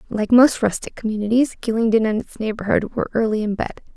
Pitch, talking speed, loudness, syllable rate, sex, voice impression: 220 Hz, 180 wpm, -20 LUFS, 6.2 syllables/s, female, very feminine, slightly young, very thin, very relaxed, very weak, very dark, very soft, very muffled, halting, raspy, very cute, very intellectual, slightly refreshing, sincere, very calm, very friendly, very reassuring, very unique, very elegant, slightly wild, very sweet, slightly lively, very kind, slightly sharp, very modest, light